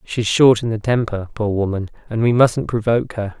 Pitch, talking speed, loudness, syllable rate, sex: 110 Hz, 210 wpm, -18 LUFS, 5.3 syllables/s, male